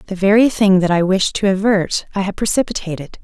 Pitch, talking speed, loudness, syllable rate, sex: 195 Hz, 205 wpm, -16 LUFS, 5.7 syllables/s, female